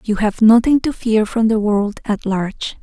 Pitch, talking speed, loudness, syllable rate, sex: 215 Hz, 215 wpm, -16 LUFS, 4.5 syllables/s, female